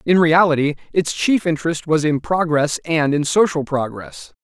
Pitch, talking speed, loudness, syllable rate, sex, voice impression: 160 Hz, 160 wpm, -18 LUFS, 4.7 syllables/s, male, masculine, adult-like, slightly fluent, sincere, slightly friendly, slightly lively